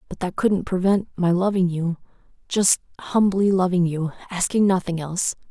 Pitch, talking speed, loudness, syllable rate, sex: 185 Hz, 140 wpm, -21 LUFS, 5.1 syllables/s, female